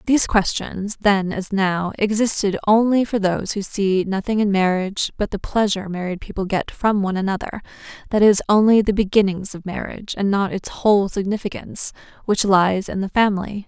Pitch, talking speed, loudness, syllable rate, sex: 200 Hz, 175 wpm, -20 LUFS, 5.5 syllables/s, female